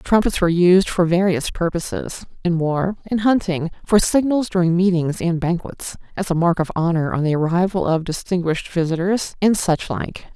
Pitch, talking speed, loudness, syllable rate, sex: 175 Hz, 170 wpm, -19 LUFS, 5.0 syllables/s, female